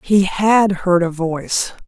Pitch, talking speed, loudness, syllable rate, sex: 185 Hz, 160 wpm, -16 LUFS, 3.6 syllables/s, female